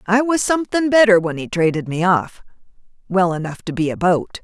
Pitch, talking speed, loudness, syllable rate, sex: 195 Hz, 190 wpm, -17 LUFS, 5.7 syllables/s, female